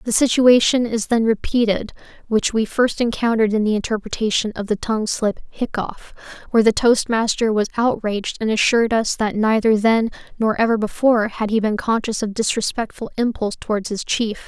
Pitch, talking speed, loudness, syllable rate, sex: 220 Hz, 170 wpm, -19 LUFS, 5.6 syllables/s, female